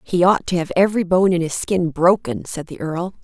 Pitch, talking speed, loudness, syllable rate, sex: 175 Hz, 240 wpm, -18 LUFS, 5.3 syllables/s, female